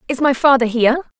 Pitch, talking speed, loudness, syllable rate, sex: 260 Hz, 200 wpm, -15 LUFS, 6.3 syllables/s, female